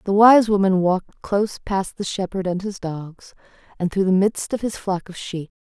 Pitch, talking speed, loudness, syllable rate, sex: 190 Hz, 215 wpm, -21 LUFS, 4.9 syllables/s, female